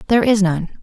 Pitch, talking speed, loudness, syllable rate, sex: 200 Hz, 220 wpm, -16 LUFS, 7.7 syllables/s, female